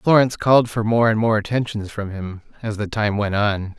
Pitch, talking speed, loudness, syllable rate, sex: 110 Hz, 220 wpm, -20 LUFS, 5.4 syllables/s, male